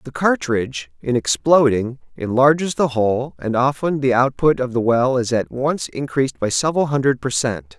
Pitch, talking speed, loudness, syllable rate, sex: 130 Hz, 175 wpm, -19 LUFS, 4.9 syllables/s, male